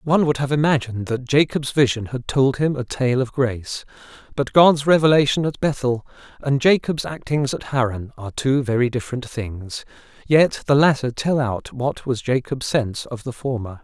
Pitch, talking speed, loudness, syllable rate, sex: 130 Hz, 180 wpm, -20 LUFS, 5.1 syllables/s, male